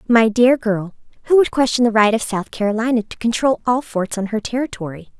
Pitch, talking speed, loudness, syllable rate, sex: 230 Hz, 210 wpm, -18 LUFS, 5.7 syllables/s, female